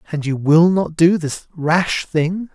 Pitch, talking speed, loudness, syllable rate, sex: 165 Hz, 190 wpm, -17 LUFS, 3.6 syllables/s, male